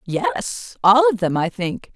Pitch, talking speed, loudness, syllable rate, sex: 210 Hz, 185 wpm, -19 LUFS, 3.5 syllables/s, female